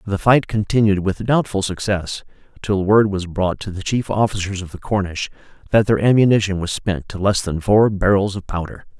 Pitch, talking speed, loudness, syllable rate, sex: 100 Hz, 195 wpm, -19 LUFS, 5.1 syllables/s, male